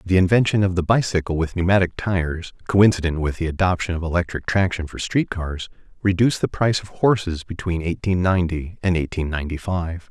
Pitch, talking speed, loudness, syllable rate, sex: 90 Hz, 180 wpm, -21 LUFS, 5.8 syllables/s, male